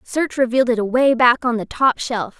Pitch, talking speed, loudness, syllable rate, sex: 245 Hz, 225 wpm, -17 LUFS, 5.2 syllables/s, female